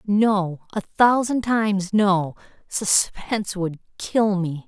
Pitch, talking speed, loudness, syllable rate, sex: 200 Hz, 105 wpm, -21 LUFS, 3.3 syllables/s, female